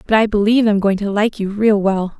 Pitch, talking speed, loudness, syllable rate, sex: 205 Hz, 275 wpm, -16 LUFS, 5.9 syllables/s, female